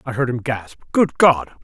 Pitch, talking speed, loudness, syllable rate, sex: 135 Hz, 220 wpm, -18 LUFS, 4.7 syllables/s, male